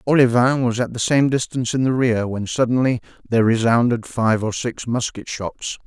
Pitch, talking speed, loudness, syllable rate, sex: 120 Hz, 185 wpm, -19 LUFS, 5.2 syllables/s, male